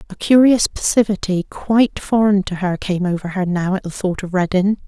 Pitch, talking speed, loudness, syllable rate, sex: 195 Hz, 195 wpm, -17 LUFS, 5.2 syllables/s, female